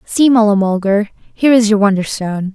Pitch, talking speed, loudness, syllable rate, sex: 210 Hz, 165 wpm, -13 LUFS, 5.7 syllables/s, female